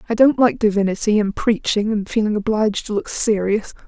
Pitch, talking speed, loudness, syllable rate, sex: 210 Hz, 185 wpm, -18 LUFS, 5.6 syllables/s, female